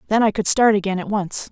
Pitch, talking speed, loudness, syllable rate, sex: 210 Hz, 275 wpm, -18 LUFS, 6.1 syllables/s, female